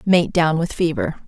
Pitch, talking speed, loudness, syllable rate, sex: 170 Hz, 190 wpm, -19 LUFS, 4.4 syllables/s, female